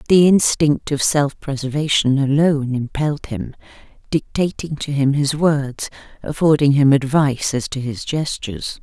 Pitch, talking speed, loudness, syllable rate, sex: 145 Hz, 135 wpm, -18 LUFS, 4.7 syllables/s, female